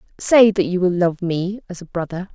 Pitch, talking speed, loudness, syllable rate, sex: 185 Hz, 230 wpm, -18 LUFS, 5.4 syllables/s, female